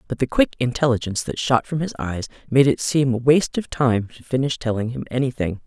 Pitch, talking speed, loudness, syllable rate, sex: 130 Hz, 210 wpm, -21 LUFS, 5.9 syllables/s, female